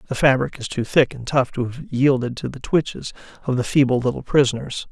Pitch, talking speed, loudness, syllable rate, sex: 130 Hz, 220 wpm, -20 LUFS, 5.7 syllables/s, male